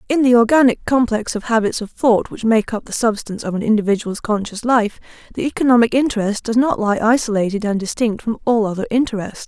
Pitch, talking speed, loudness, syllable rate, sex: 225 Hz, 195 wpm, -17 LUFS, 6.0 syllables/s, female